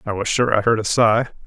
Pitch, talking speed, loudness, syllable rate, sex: 110 Hz, 285 wpm, -18 LUFS, 5.9 syllables/s, male